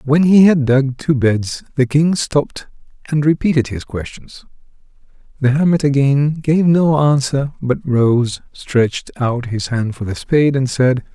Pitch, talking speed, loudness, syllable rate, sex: 135 Hz, 160 wpm, -16 LUFS, 4.2 syllables/s, male